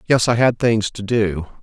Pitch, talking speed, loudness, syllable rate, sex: 110 Hz, 220 wpm, -18 LUFS, 4.5 syllables/s, male